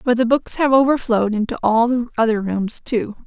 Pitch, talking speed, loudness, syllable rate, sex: 235 Hz, 200 wpm, -18 LUFS, 5.4 syllables/s, female